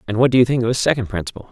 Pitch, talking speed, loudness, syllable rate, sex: 120 Hz, 355 wpm, -18 LUFS, 8.9 syllables/s, male